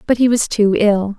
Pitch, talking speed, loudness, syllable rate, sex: 215 Hz, 255 wpm, -15 LUFS, 4.8 syllables/s, female